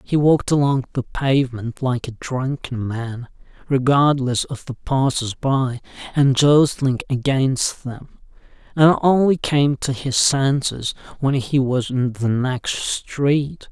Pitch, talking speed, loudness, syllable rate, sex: 135 Hz, 135 wpm, -19 LUFS, 3.7 syllables/s, male